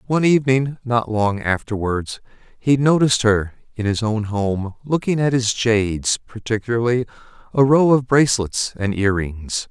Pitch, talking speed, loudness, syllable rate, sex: 115 Hz, 150 wpm, -19 LUFS, 4.7 syllables/s, male